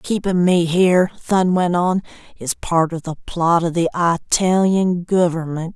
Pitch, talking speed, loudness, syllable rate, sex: 175 Hz, 155 wpm, -18 LUFS, 4.9 syllables/s, female